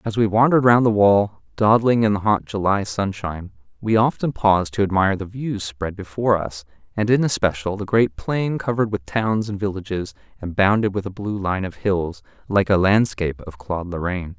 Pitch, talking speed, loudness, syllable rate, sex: 100 Hz, 195 wpm, -20 LUFS, 5.4 syllables/s, male